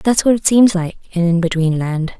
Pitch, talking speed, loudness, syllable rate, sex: 185 Hz, 245 wpm, -15 LUFS, 5.3 syllables/s, female